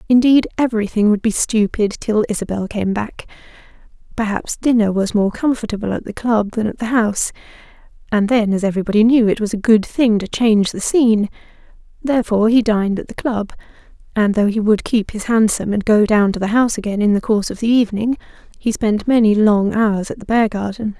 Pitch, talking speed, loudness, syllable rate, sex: 215 Hz, 195 wpm, -17 LUFS, 5.9 syllables/s, female